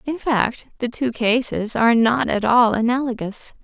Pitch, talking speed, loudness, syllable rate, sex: 235 Hz, 165 wpm, -19 LUFS, 4.5 syllables/s, female